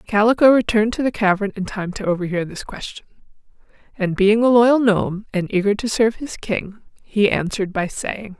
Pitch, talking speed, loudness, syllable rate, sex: 210 Hz, 185 wpm, -19 LUFS, 5.4 syllables/s, female